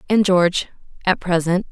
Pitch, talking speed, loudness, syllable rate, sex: 180 Hz, 105 wpm, -19 LUFS, 5.4 syllables/s, female